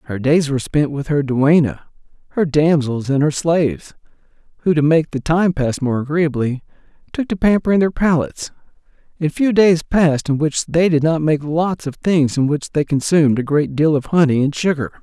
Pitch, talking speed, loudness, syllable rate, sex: 150 Hz, 195 wpm, -17 LUFS, 5.2 syllables/s, male